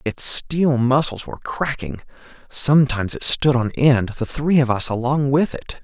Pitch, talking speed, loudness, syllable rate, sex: 130 Hz, 175 wpm, -19 LUFS, 4.7 syllables/s, male